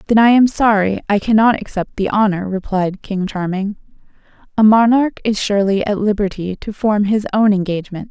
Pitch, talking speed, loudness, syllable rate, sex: 205 Hz, 170 wpm, -16 LUFS, 5.3 syllables/s, female